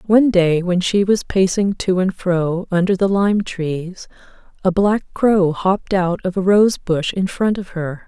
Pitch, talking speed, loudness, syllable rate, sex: 185 Hz, 195 wpm, -17 LUFS, 4.0 syllables/s, female